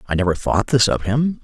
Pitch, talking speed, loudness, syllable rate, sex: 120 Hz, 250 wpm, -18 LUFS, 5.5 syllables/s, male